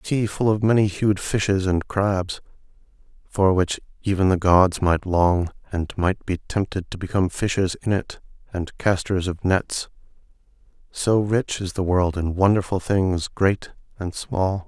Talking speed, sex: 160 wpm, male